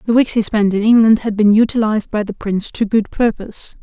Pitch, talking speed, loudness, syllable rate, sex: 215 Hz, 235 wpm, -15 LUFS, 6.0 syllables/s, female